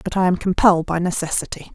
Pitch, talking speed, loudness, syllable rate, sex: 175 Hz, 205 wpm, -19 LUFS, 6.7 syllables/s, female